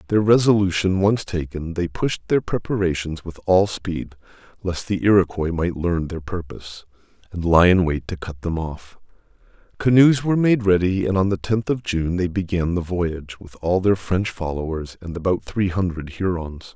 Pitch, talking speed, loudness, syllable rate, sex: 90 Hz, 180 wpm, -21 LUFS, 4.8 syllables/s, male